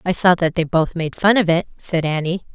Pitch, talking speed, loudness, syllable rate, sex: 170 Hz, 260 wpm, -18 LUFS, 5.2 syllables/s, female